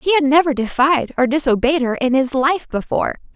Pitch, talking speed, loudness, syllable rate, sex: 275 Hz, 195 wpm, -17 LUFS, 5.5 syllables/s, female